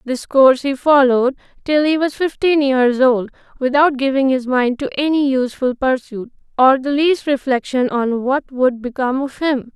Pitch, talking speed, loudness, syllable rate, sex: 265 Hz, 170 wpm, -16 LUFS, 4.8 syllables/s, female